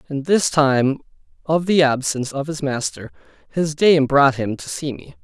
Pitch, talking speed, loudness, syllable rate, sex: 145 Hz, 185 wpm, -19 LUFS, 4.6 syllables/s, male